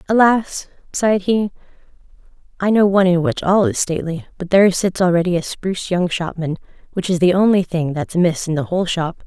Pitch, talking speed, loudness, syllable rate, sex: 180 Hz, 195 wpm, -17 LUFS, 5.9 syllables/s, female